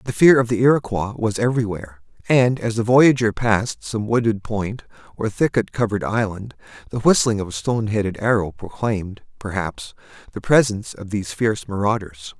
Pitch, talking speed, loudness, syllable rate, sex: 110 Hz, 165 wpm, -20 LUFS, 5.6 syllables/s, male